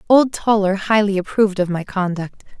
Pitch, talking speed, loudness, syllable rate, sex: 200 Hz, 160 wpm, -18 LUFS, 5.2 syllables/s, female